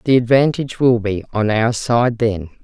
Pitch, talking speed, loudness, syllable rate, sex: 115 Hz, 180 wpm, -17 LUFS, 4.7 syllables/s, female